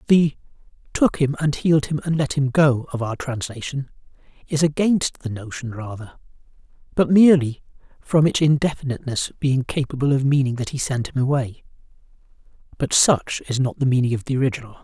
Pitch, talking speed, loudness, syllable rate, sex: 135 Hz, 165 wpm, -21 LUFS, 5.6 syllables/s, male